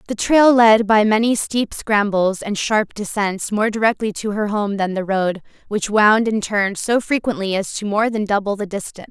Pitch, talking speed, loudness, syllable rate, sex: 210 Hz, 205 wpm, -18 LUFS, 4.8 syllables/s, female